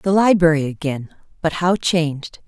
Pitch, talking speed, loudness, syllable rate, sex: 165 Hz, 145 wpm, -18 LUFS, 4.6 syllables/s, female